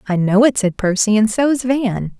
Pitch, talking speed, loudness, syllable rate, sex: 220 Hz, 220 wpm, -16 LUFS, 4.6 syllables/s, female